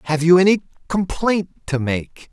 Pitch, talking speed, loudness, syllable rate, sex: 170 Hz, 155 wpm, -19 LUFS, 4.8 syllables/s, male